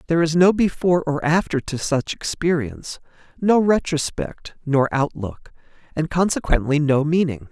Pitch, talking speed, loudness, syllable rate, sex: 155 Hz, 135 wpm, -20 LUFS, 4.9 syllables/s, male